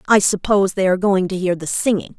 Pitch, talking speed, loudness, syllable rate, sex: 190 Hz, 245 wpm, -18 LUFS, 6.4 syllables/s, female